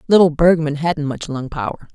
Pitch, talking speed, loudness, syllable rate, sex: 155 Hz, 185 wpm, -18 LUFS, 5.2 syllables/s, female